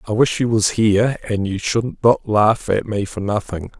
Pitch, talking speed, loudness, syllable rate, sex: 105 Hz, 220 wpm, -18 LUFS, 4.6 syllables/s, male